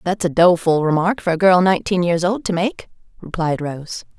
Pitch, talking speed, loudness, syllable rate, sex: 175 Hz, 200 wpm, -17 LUFS, 5.5 syllables/s, female